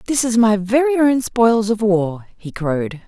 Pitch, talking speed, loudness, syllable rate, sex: 215 Hz, 195 wpm, -17 LUFS, 4.3 syllables/s, female